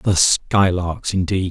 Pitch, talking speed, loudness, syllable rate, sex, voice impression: 90 Hz, 120 wpm, -18 LUFS, 3.3 syllables/s, male, very masculine, slightly old, very thick, slightly tensed, slightly powerful, dark, hard, slightly muffled, fluent, very cool, intellectual, slightly refreshing, sincere, very calm, very mature, very friendly, reassuring, unique, elegant, very wild, slightly sweet, lively, kind, slightly modest